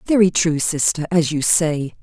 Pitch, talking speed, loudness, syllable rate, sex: 165 Hz, 180 wpm, -17 LUFS, 4.4 syllables/s, female